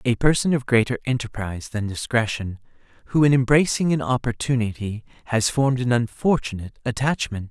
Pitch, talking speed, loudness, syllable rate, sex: 120 Hz, 135 wpm, -22 LUFS, 5.7 syllables/s, male